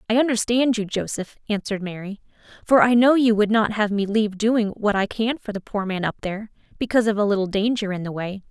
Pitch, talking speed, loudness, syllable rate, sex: 210 Hz, 235 wpm, -21 LUFS, 6.2 syllables/s, female